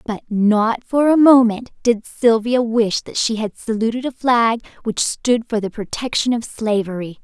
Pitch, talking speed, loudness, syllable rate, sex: 230 Hz, 175 wpm, -18 LUFS, 4.4 syllables/s, female